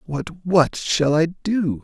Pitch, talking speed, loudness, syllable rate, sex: 165 Hz, 165 wpm, -20 LUFS, 3.0 syllables/s, male